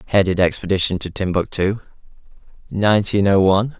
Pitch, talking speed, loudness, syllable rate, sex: 100 Hz, 110 wpm, -18 LUFS, 6.0 syllables/s, male